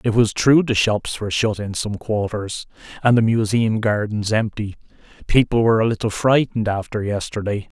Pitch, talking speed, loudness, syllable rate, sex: 110 Hz, 170 wpm, -19 LUFS, 5.2 syllables/s, male